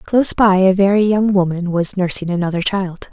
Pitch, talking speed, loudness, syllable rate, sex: 190 Hz, 190 wpm, -16 LUFS, 5.4 syllables/s, female